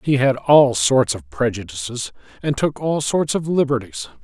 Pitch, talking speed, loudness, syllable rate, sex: 125 Hz, 170 wpm, -19 LUFS, 4.5 syllables/s, male